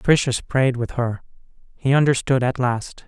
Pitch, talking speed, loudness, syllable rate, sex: 125 Hz, 155 wpm, -20 LUFS, 4.8 syllables/s, male